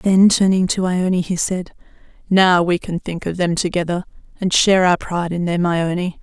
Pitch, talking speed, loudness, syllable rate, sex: 180 Hz, 195 wpm, -17 LUFS, 4.7 syllables/s, female